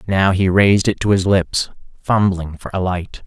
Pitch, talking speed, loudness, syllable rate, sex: 95 Hz, 200 wpm, -17 LUFS, 4.7 syllables/s, male